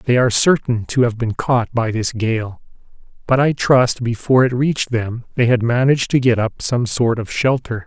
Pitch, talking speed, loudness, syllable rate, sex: 120 Hz, 205 wpm, -17 LUFS, 5.0 syllables/s, male